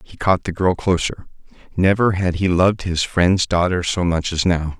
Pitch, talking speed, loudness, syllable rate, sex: 90 Hz, 200 wpm, -18 LUFS, 4.8 syllables/s, male